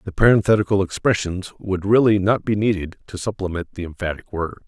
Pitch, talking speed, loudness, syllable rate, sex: 95 Hz, 165 wpm, -20 LUFS, 5.9 syllables/s, male